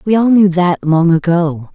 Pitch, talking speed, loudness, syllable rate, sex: 175 Hz, 205 wpm, -12 LUFS, 4.4 syllables/s, female